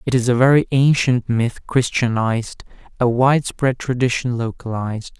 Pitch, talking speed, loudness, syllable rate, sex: 120 Hz, 140 wpm, -18 LUFS, 4.7 syllables/s, male